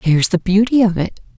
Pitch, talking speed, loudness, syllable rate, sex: 195 Hz, 215 wpm, -15 LUFS, 6.1 syllables/s, female